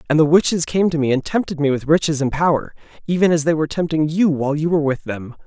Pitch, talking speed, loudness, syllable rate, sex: 155 Hz, 265 wpm, -18 LUFS, 6.8 syllables/s, male